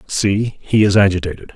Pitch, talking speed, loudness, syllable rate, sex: 100 Hz, 155 wpm, -16 LUFS, 5.2 syllables/s, male